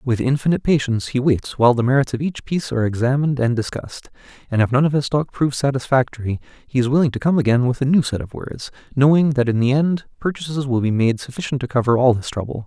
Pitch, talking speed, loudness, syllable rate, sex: 130 Hz, 235 wpm, -19 LUFS, 6.7 syllables/s, male